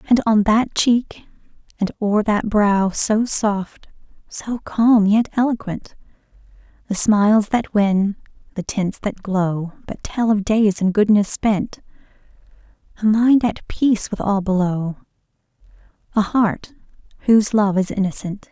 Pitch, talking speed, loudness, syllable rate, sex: 210 Hz, 135 wpm, -18 LUFS, 4.0 syllables/s, female